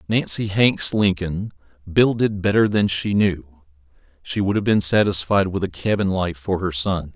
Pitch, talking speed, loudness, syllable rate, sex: 95 Hz, 170 wpm, -20 LUFS, 4.5 syllables/s, male